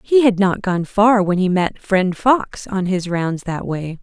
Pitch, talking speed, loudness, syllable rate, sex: 195 Hz, 225 wpm, -18 LUFS, 3.9 syllables/s, female